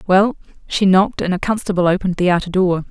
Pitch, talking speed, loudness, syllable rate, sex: 190 Hz, 205 wpm, -17 LUFS, 6.6 syllables/s, female